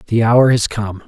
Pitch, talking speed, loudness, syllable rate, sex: 110 Hz, 225 wpm, -14 LUFS, 4.0 syllables/s, male